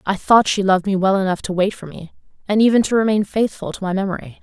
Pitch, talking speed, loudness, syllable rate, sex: 195 Hz, 260 wpm, -18 LUFS, 6.6 syllables/s, female